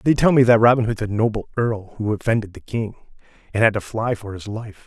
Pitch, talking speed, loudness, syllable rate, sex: 110 Hz, 245 wpm, -20 LUFS, 5.9 syllables/s, male